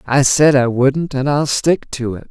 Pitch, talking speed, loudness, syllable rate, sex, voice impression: 135 Hz, 235 wpm, -15 LUFS, 4.2 syllables/s, male, very masculine, slightly young, slightly thick, tensed, slightly powerful, slightly dark, slightly soft, clear, fluent, slightly cool, intellectual, refreshing, slightly sincere, calm, slightly mature, very friendly, very reassuring, slightly unique, elegant, slightly wild, sweet, lively, kind, slightly modest